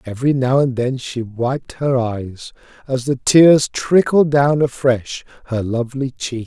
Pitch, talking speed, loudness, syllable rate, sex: 130 Hz, 160 wpm, -17 LUFS, 3.8 syllables/s, male